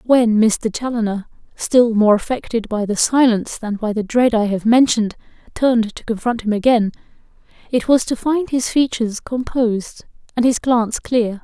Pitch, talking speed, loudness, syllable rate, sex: 230 Hz, 170 wpm, -17 LUFS, 5.0 syllables/s, female